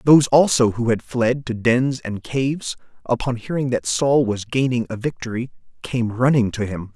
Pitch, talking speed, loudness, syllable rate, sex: 120 Hz, 180 wpm, -20 LUFS, 4.8 syllables/s, male